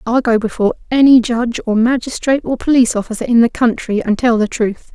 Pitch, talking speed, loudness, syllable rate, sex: 235 Hz, 205 wpm, -14 LUFS, 6.2 syllables/s, female